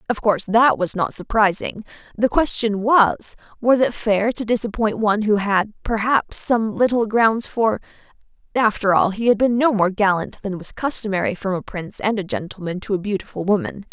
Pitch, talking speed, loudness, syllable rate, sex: 210 Hz, 185 wpm, -20 LUFS, 5.2 syllables/s, female